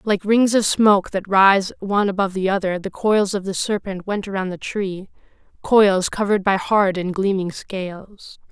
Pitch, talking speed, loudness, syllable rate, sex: 195 Hz, 175 wpm, -19 LUFS, 4.8 syllables/s, female